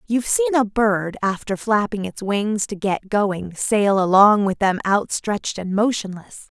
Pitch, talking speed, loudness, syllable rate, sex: 200 Hz, 165 wpm, -20 LUFS, 4.3 syllables/s, female